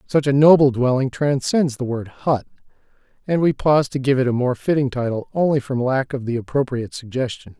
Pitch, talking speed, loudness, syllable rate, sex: 135 Hz, 195 wpm, -19 LUFS, 5.6 syllables/s, male